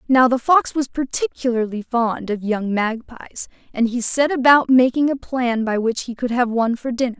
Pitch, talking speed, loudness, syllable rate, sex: 245 Hz, 200 wpm, -19 LUFS, 4.9 syllables/s, female